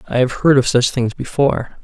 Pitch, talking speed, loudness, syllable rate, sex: 130 Hz, 230 wpm, -16 LUFS, 5.8 syllables/s, male